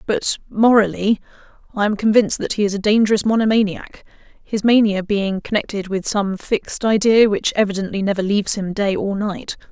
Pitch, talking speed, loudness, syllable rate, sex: 205 Hz, 165 wpm, -18 LUFS, 5.5 syllables/s, female